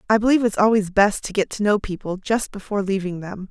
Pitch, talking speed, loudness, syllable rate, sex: 200 Hz, 240 wpm, -21 LUFS, 6.3 syllables/s, female